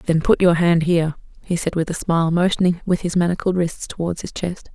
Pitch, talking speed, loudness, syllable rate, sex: 170 Hz, 225 wpm, -20 LUFS, 5.7 syllables/s, female